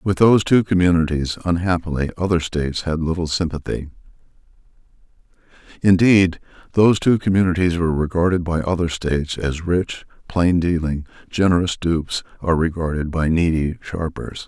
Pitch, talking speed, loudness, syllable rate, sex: 85 Hz, 120 wpm, -19 LUFS, 5.4 syllables/s, male